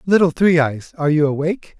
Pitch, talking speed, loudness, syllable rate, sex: 160 Hz, 200 wpm, -17 LUFS, 6.1 syllables/s, male